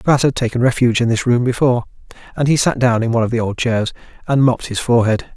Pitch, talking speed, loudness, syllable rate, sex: 120 Hz, 245 wpm, -16 LUFS, 7.1 syllables/s, male